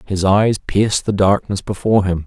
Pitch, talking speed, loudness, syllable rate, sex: 100 Hz, 185 wpm, -16 LUFS, 5.2 syllables/s, male